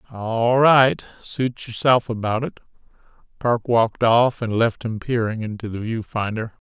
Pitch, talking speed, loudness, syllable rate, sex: 115 Hz, 145 wpm, -20 LUFS, 4.3 syllables/s, male